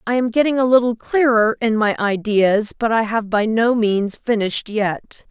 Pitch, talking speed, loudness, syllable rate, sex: 225 Hz, 190 wpm, -18 LUFS, 4.6 syllables/s, female